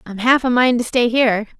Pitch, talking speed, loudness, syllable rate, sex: 240 Hz, 265 wpm, -16 LUFS, 5.8 syllables/s, female